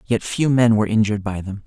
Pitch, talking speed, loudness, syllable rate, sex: 110 Hz, 250 wpm, -19 LUFS, 6.6 syllables/s, male